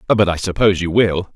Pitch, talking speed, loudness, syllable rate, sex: 95 Hz, 220 wpm, -16 LUFS, 6.0 syllables/s, male